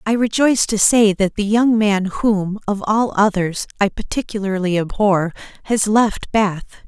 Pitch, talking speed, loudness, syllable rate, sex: 205 Hz, 155 wpm, -17 LUFS, 4.4 syllables/s, female